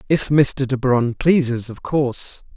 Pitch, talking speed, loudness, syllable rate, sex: 130 Hz, 165 wpm, -19 LUFS, 4.4 syllables/s, male